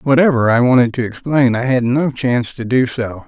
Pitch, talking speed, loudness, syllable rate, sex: 125 Hz, 220 wpm, -15 LUFS, 5.3 syllables/s, male